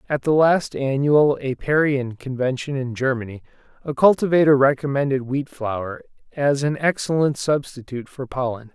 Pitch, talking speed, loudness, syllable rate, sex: 135 Hz, 130 wpm, -20 LUFS, 4.9 syllables/s, male